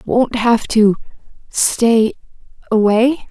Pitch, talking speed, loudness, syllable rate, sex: 230 Hz, 55 wpm, -15 LUFS, 2.8 syllables/s, female